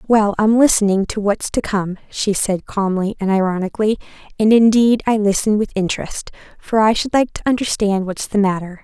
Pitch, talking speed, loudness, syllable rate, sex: 205 Hz, 185 wpm, -17 LUFS, 5.3 syllables/s, female